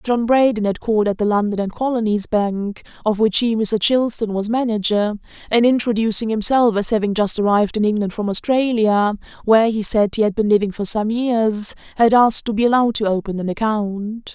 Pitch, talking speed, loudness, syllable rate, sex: 215 Hz, 195 wpm, -18 LUFS, 5.5 syllables/s, female